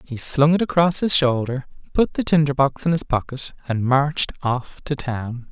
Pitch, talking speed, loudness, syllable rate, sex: 140 Hz, 195 wpm, -20 LUFS, 4.7 syllables/s, male